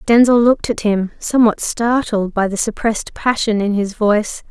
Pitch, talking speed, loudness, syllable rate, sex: 220 Hz, 175 wpm, -16 LUFS, 5.1 syllables/s, female